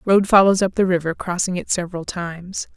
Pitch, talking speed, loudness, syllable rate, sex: 180 Hz, 195 wpm, -19 LUFS, 5.7 syllables/s, female